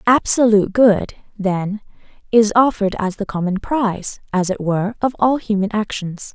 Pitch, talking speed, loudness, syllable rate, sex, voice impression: 210 Hz, 150 wpm, -18 LUFS, 4.9 syllables/s, female, feminine, slightly young, slightly cute, friendly, slightly kind